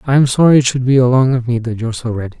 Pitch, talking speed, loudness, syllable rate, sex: 125 Hz, 325 wpm, -14 LUFS, 7.6 syllables/s, male